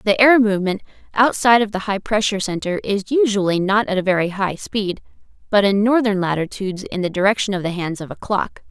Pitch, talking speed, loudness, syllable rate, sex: 200 Hz, 205 wpm, -18 LUFS, 6.1 syllables/s, female